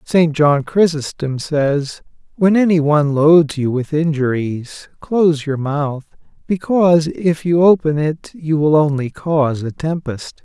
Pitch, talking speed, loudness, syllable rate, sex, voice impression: 155 Hz, 140 wpm, -16 LUFS, 3.9 syllables/s, male, very masculine, very middle-aged, very thick, slightly tensed, powerful, slightly bright, slightly soft, clear, fluent, slightly raspy, slightly cool, intellectual, slightly refreshing, sincere, very calm, mature, friendly, reassuring, slightly unique, elegant, slightly wild, sweet, slightly lively, kind, modest